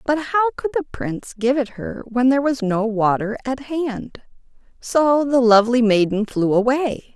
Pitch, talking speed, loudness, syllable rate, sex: 250 Hz, 175 wpm, -19 LUFS, 4.6 syllables/s, female